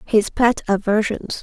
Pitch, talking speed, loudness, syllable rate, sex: 215 Hz, 125 wpm, -19 LUFS, 4.0 syllables/s, female